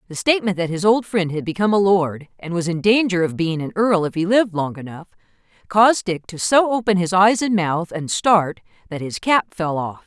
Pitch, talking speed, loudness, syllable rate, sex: 185 Hz, 235 wpm, -19 LUFS, 5.4 syllables/s, female